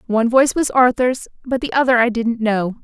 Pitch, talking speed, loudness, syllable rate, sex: 240 Hz, 210 wpm, -17 LUFS, 5.6 syllables/s, female